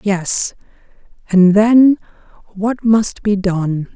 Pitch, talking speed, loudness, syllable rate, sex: 205 Hz, 105 wpm, -14 LUFS, 2.8 syllables/s, female